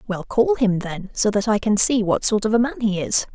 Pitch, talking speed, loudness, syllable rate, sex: 215 Hz, 285 wpm, -20 LUFS, 5.4 syllables/s, female